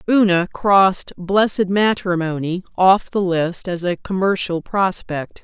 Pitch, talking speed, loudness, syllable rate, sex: 185 Hz, 120 wpm, -18 LUFS, 4.0 syllables/s, female